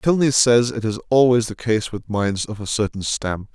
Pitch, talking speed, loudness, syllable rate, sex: 115 Hz, 220 wpm, -19 LUFS, 4.8 syllables/s, male